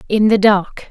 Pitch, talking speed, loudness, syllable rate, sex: 205 Hz, 200 wpm, -14 LUFS, 4.1 syllables/s, female